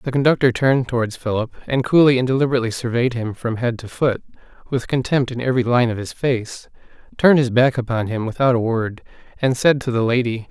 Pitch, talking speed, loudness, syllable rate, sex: 125 Hz, 205 wpm, -19 LUFS, 6.2 syllables/s, male